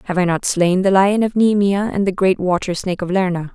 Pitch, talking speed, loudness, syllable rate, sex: 190 Hz, 255 wpm, -17 LUFS, 5.6 syllables/s, female